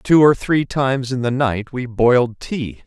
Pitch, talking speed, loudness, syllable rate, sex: 125 Hz, 210 wpm, -18 LUFS, 4.3 syllables/s, male